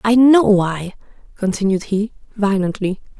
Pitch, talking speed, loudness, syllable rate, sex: 205 Hz, 115 wpm, -17 LUFS, 4.3 syllables/s, female